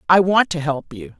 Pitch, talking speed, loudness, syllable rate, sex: 170 Hz, 250 wpm, -18 LUFS, 5.0 syllables/s, female